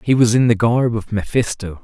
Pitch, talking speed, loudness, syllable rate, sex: 115 Hz, 230 wpm, -17 LUFS, 5.2 syllables/s, male